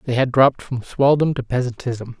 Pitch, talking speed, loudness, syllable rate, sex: 125 Hz, 190 wpm, -19 LUFS, 5.4 syllables/s, male